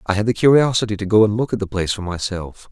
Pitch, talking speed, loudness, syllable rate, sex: 105 Hz, 285 wpm, -18 LUFS, 7.0 syllables/s, male